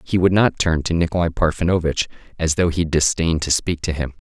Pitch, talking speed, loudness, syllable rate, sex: 80 Hz, 210 wpm, -19 LUFS, 5.9 syllables/s, male